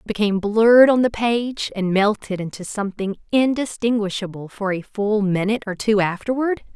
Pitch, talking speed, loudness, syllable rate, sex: 210 Hz, 150 wpm, -20 LUFS, 5.2 syllables/s, female